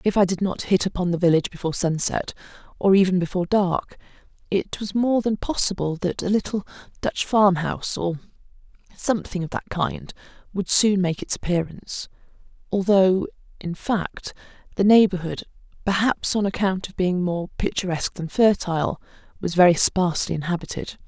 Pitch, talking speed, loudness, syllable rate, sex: 185 Hz, 145 wpm, -22 LUFS, 4.6 syllables/s, female